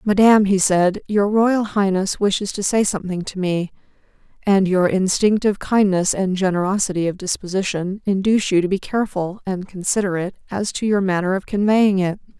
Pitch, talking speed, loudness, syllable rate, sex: 195 Hz, 165 wpm, -19 LUFS, 5.5 syllables/s, female